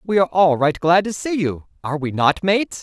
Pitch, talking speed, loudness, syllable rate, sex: 175 Hz, 255 wpm, -18 LUFS, 5.8 syllables/s, male